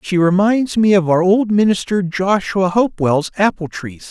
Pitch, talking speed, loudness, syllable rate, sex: 190 Hz, 160 wpm, -15 LUFS, 4.6 syllables/s, male